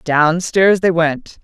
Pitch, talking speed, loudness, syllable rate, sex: 175 Hz, 125 wpm, -14 LUFS, 2.9 syllables/s, female